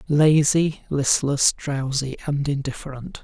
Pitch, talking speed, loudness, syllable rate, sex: 140 Hz, 95 wpm, -21 LUFS, 3.8 syllables/s, male